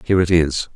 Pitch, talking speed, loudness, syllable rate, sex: 85 Hz, 240 wpm, -17 LUFS, 6.4 syllables/s, male